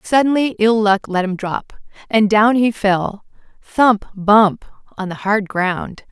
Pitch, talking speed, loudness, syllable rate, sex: 210 Hz, 135 wpm, -16 LUFS, 3.6 syllables/s, female